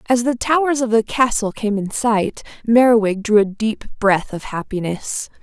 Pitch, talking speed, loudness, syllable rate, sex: 220 Hz, 175 wpm, -18 LUFS, 4.7 syllables/s, female